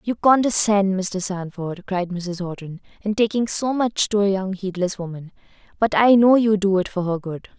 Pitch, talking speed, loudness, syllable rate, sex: 195 Hz, 200 wpm, -20 LUFS, 4.8 syllables/s, female